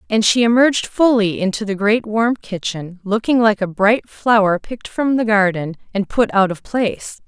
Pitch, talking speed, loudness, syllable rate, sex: 215 Hz, 190 wpm, -17 LUFS, 4.9 syllables/s, female